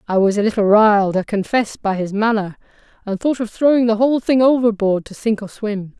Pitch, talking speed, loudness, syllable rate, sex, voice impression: 215 Hz, 220 wpm, -17 LUFS, 5.6 syllables/s, female, very feminine, very adult-like, middle-aged, slightly thin, tensed, slightly powerful, bright, hard, clear, fluent, cool, intellectual, very refreshing, sincere, calm, friendly, reassuring, slightly unique, slightly elegant, wild, very lively, slightly strict, slightly intense, sharp